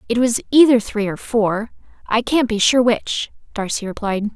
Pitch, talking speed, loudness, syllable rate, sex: 225 Hz, 180 wpm, -18 LUFS, 4.6 syllables/s, female